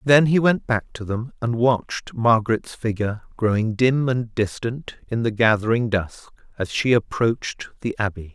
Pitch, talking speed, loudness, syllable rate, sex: 115 Hz, 165 wpm, -22 LUFS, 4.7 syllables/s, male